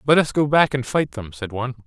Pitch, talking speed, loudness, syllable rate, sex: 130 Hz, 290 wpm, -21 LUFS, 6.1 syllables/s, male